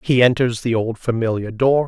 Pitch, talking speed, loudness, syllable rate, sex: 120 Hz, 190 wpm, -19 LUFS, 5.0 syllables/s, male